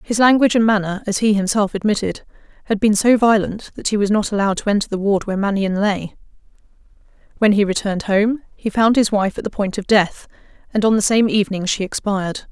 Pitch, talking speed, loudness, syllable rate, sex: 205 Hz, 210 wpm, -18 LUFS, 6.1 syllables/s, female